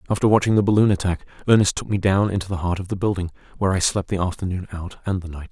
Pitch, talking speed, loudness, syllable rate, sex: 95 Hz, 260 wpm, -21 LUFS, 7.2 syllables/s, male